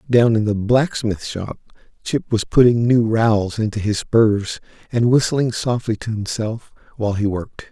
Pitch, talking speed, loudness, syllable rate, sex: 110 Hz, 165 wpm, -19 LUFS, 4.6 syllables/s, male